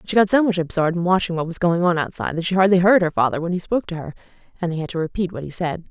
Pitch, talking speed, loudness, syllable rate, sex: 175 Hz, 315 wpm, -20 LUFS, 7.6 syllables/s, female